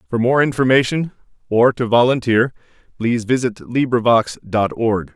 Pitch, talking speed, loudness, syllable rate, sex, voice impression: 120 Hz, 130 wpm, -17 LUFS, 4.8 syllables/s, male, masculine, slightly middle-aged, slightly thick, slightly tensed, slightly weak, bright, slightly soft, clear, fluent, slightly cool, intellectual, refreshing, very sincere, calm, slightly mature, friendly, reassuring, slightly unique, elegant, sweet, slightly lively, slightly kind, slightly intense, slightly modest